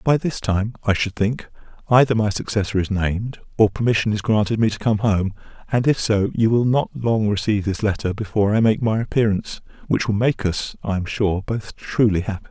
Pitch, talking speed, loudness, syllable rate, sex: 105 Hz, 210 wpm, -20 LUFS, 5.6 syllables/s, male